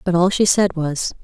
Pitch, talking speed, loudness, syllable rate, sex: 175 Hz, 240 wpm, -17 LUFS, 4.8 syllables/s, female